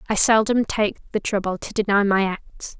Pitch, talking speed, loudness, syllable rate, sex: 205 Hz, 195 wpm, -20 LUFS, 4.9 syllables/s, female